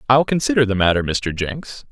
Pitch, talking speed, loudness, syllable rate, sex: 115 Hz, 190 wpm, -18 LUFS, 5.3 syllables/s, male